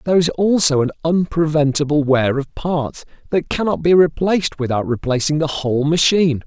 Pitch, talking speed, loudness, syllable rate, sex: 155 Hz, 160 wpm, -17 LUFS, 5.4 syllables/s, male